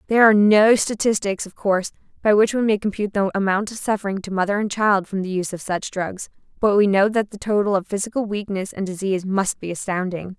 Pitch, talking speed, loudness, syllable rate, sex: 200 Hz, 225 wpm, -20 LUFS, 6.2 syllables/s, female